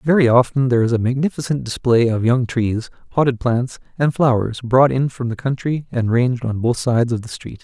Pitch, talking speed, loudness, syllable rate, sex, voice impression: 125 Hz, 210 wpm, -18 LUFS, 5.5 syllables/s, male, masculine, adult-like, slightly thick, slightly relaxed, slightly dark, muffled, cool, calm, slightly mature, slightly friendly, reassuring, kind, modest